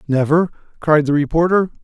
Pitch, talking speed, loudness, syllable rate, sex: 155 Hz, 130 wpm, -16 LUFS, 5.5 syllables/s, male